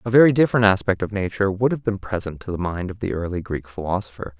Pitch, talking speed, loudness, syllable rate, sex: 95 Hz, 245 wpm, -22 LUFS, 6.8 syllables/s, male